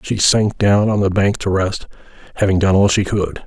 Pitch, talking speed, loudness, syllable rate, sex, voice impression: 100 Hz, 225 wpm, -16 LUFS, 5.0 syllables/s, male, masculine, middle-aged, very thick, tensed, slightly powerful, slightly hard, muffled, raspy, cool, intellectual, calm, mature, unique, wild, slightly lively, slightly strict